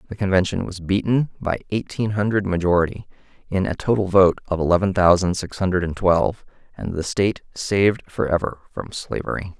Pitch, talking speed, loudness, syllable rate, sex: 95 Hz, 155 wpm, -21 LUFS, 5.5 syllables/s, male